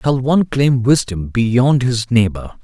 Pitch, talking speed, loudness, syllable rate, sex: 120 Hz, 160 wpm, -15 LUFS, 3.9 syllables/s, male